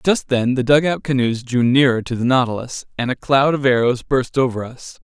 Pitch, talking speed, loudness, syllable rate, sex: 130 Hz, 215 wpm, -18 LUFS, 5.3 syllables/s, male